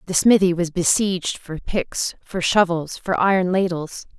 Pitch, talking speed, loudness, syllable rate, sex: 180 Hz, 160 wpm, -20 LUFS, 4.5 syllables/s, female